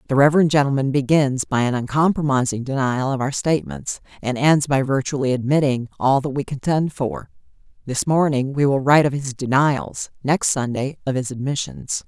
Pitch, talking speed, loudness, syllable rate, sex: 140 Hz, 170 wpm, -20 LUFS, 5.3 syllables/s, female